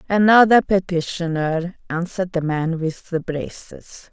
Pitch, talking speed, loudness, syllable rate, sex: 175 Hz, 115 wpm, -19 LUFS, 4.2 syllables/s, female